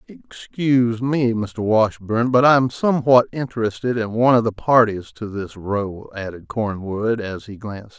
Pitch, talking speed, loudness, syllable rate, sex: 110 Hz, 180 wpm, -19 LUFS, 4.8 syllables/s, male